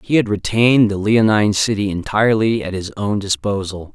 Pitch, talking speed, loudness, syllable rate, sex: 105 Hz, 165 wpm, -17 LUFS, 5.5 syllables/s, male